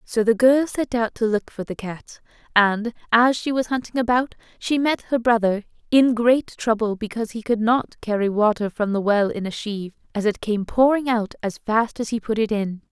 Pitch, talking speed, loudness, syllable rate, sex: 225 Hz, 220 wpm, -21 LUFS, 5.0 syllables/s, female